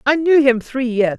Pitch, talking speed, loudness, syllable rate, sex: 260 Hz, 255 wpm, -16 LUFS, 4.7 syllables/s, female